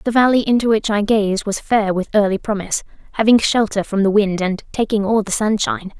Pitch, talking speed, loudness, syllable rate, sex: 210 Hz, 210 wpm, -17 LUFS, 5.7 syllables/s, female